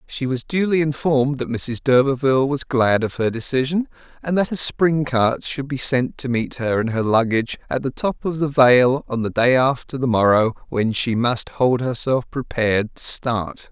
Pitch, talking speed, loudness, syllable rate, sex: 130 Hz, 200 wpm, -19 LUFS, 4.7 syllables/s, male